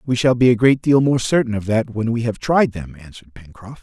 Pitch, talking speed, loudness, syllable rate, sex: 115 Hz, 265 wpm, -17 LUFS, 5.7 syllables/s, male